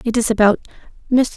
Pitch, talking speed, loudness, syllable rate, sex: 230 Hz, 130 wpm, -17 LUFS, 6.8 syllables/s, female